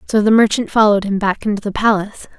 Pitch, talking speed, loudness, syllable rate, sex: 210 Hz, 225 wpm, -15 LUFS, 7.0 syllables/s, female